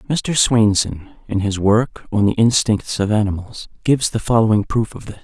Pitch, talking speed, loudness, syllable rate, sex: 110 Hz, 185 wpm, -17 LUFS, 4.9 syllables/s, male